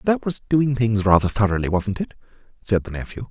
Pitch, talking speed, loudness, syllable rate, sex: 110 Hz, 200 wpm, -21 LUFS, 5.8 syllables/s, male